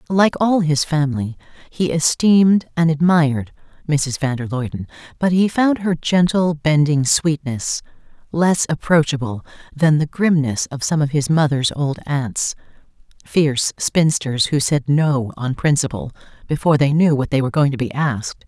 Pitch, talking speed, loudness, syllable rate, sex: 150 Hz, 155 wpm, -18 LUFS, 4.6 syllables/s, female